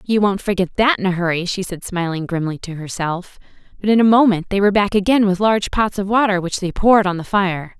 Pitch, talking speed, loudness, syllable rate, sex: 190 Hz, 245 wpm, -17 LUFS, 6.0 syllables/s, female